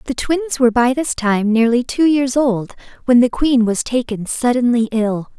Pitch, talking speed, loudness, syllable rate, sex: 245 Hz, 190 wpm, -16 LUFS, 4.6 syllables/s, female